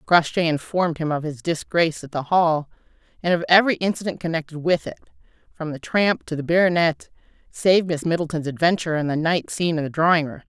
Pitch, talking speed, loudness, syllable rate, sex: 165 Hz, 195 wpm, -21 LUFS, 6.1 syllables/s, female